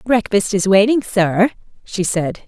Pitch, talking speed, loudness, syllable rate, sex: 205 Hz, 145 wpm, -16 LUFS, 4.1 syllables/s, female